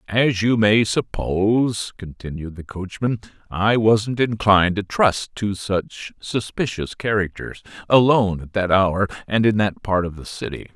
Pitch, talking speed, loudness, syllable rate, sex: 100 Hz, 150 wpm, -20 LUFS, 4.3 syllables/s, male